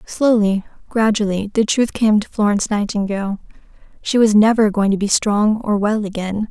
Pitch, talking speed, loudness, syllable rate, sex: 210 Hz, 165 wpm, -17 LUFS, 5.1 syllables/s, female